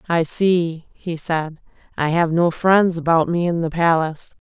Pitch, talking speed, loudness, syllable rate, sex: 165 Hz, 175 wpm, -19 LUFS, 4.2 syllables/s, female